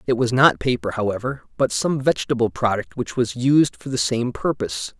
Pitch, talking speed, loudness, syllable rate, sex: 125 Hz, 190 wpm, -21 LUFS, 5.4 syllables/s, male